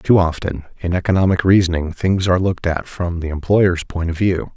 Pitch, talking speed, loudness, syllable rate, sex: 90 Hz, 195 wpm, -18 LUFS, 5.5 syllables/s, male